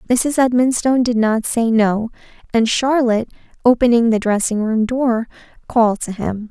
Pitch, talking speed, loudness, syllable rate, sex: 235 Hz, 150 wpm, -17 LUFS, 4.9 syllables/s, female